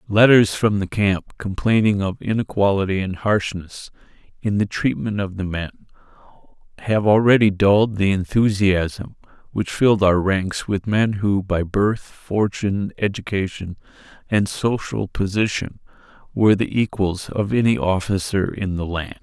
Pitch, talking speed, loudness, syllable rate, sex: 100 Hz, 135 wpm, -20 LUFS, 4.5 syllables/s, male